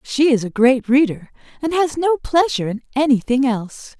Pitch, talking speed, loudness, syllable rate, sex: 265 Hz, 180 wpm, -18 LUFS, 5.2 syllables/s, female